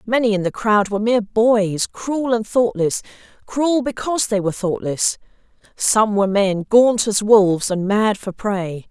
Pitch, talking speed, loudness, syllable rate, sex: 210 Hz, 160 wpm, -18 LUFS, 4.5 syllables/s, female